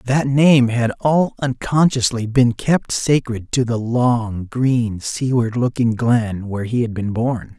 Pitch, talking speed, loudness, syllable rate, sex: 120 Hz, 160 wpm, -18 LUFS, 3.6 syllables/s, male